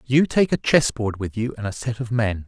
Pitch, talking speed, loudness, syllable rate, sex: 115 Hz, 265 wpm, -22 LUFS, 5.1 syllables/s, male